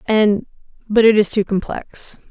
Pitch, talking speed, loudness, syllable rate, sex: 210 Hz, 130 wpm, -17 LUFS, 4.1 syllables/s, female